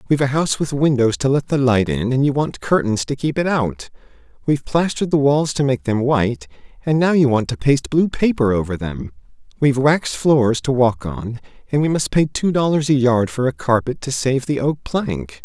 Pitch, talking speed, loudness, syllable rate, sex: 130 Hz, 225 wpm, -18 LUFS, 5.4 syllables/s, male